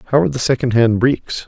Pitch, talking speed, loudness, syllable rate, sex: 120 Hz, 205 wpm, -16 LUFS, 6.6 syllables/s, male